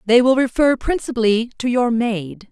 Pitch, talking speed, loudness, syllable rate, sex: 235 Hz, 165 wpm, -18 LUFS, 4.7 syllables/s, female